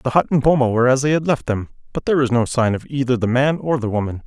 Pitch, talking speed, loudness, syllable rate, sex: 130 Hz, 310 wpm, -18 LUFS, 6.9 syllables/s, male